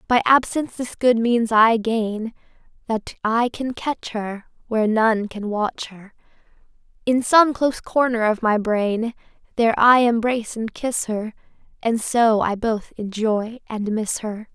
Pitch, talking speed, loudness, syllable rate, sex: 225 Hz, 155 wpm, -20 LUFS, 4.0 syllables/s, female